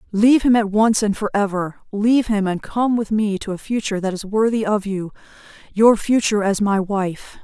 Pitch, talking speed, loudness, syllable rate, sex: 210 Hz, 195 wpm, -19 LUFS, 5.3 syllables/s, female